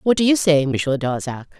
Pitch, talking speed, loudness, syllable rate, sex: 155 Hz, 225 wpm, -18 LUFS, 5.2 syllables/s, female